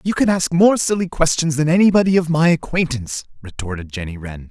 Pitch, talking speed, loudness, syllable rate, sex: 150 Hz, 185 wpm, -17 LUFS, 5.9 syllables/s, male